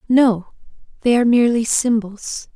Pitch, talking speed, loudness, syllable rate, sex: 230 Hz, 120 wpm, -17 LUFS, 4.8 syllables/s, female